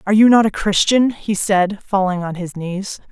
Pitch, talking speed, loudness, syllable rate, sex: 200 Hz, 210 wpm, -17 LUFS, 4.9 syllables/s, female